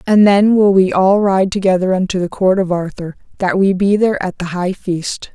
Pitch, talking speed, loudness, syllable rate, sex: 190 Hz, 225 wpm, -14 LUFS, 5.0 syllables/s, female